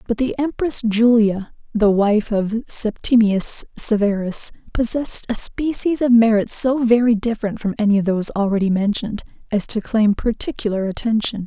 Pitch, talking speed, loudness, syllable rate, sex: 220 Hz, 145 wpm, -18 LUFS, 5.1 syllables/s, female